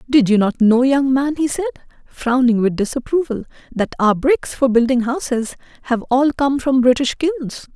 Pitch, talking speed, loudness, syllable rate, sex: 260 Hz, 180 wpm, -17 LUFS, 4.7 syllables/s, female